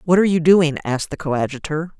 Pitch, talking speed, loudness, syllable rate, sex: 160 Hz, 210 wpm, -18 LUFS, 6.8 syllables/s, female